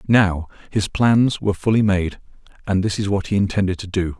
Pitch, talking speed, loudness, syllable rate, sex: 100 Hz, 200 wpm, -20 LUFS, 5.4 syllables/s, male